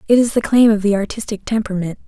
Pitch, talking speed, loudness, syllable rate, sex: 210 Hz, 230 wpm, -17 LUFS, 7.1 syllables/s, female